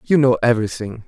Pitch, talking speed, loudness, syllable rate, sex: 120 Hz, 170 wpm, -17 LUFS, 6.5 syllables/s, male